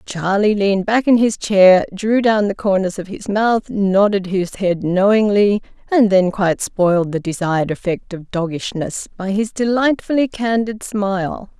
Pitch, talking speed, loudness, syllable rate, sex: 200 Hz, 160 wpm, -17 LUFS, 4.5 syllables/s, female